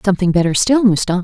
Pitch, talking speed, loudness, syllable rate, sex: 195 Hz, 195 wpm, -14 LUFS, 7.1 syllables/s, female